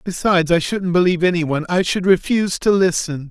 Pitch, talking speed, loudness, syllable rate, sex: 175 Hz, 180 wpm, -17 LUFS, 6.0 syllables/s, male